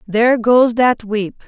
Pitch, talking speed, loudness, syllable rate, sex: 230 Hz, 160 wpm, -14 LUFS, 3.9 syllables/s, female